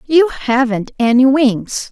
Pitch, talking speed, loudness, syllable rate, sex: 255 Hz, 125 wpm, -14 LUFS, 3.5 syllables/s, female